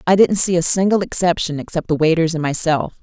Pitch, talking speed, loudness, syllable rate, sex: 170 Hz, 220 wpm, -17 LUFS, 5.9 syllables/s, female